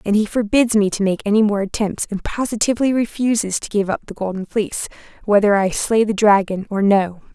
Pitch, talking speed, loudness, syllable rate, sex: 210 Hz, 205 wpm, -18 LUFS, 5.8 syllables/s, female